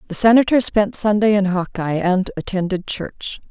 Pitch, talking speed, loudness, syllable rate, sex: 200 Hz, 155 wpm, -18 LUFS, 4.7 syllables/s, female